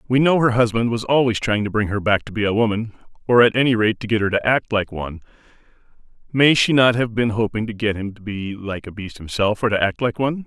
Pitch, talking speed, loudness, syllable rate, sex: 110 Hz, 265 wpm, -19 LUFS, 6.1 syllables/s, male